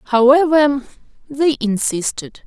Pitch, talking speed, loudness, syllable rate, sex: 265 Hz, 75 wpm, -16 LUFS, 3.6 syllables/s, female